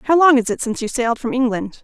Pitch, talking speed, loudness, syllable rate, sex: 250 Hz, 295 wpm, -17 LUFS, 7.2 syllables/s, female